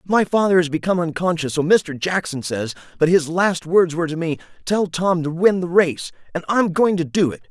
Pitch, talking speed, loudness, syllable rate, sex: 170 Hz, 225 wpm, -19 LUFS, 5.3 syllables/s, male